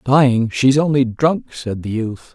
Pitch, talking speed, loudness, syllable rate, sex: 125 Hz, 180 wpm, -17 LUFS, 4.0 syllables/s, male